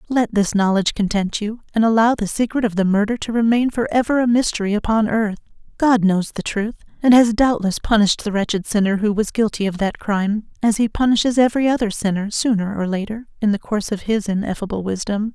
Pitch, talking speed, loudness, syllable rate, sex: 215 Hz, 205 wpm, -19 LUFS, 6.0 syllables/s, female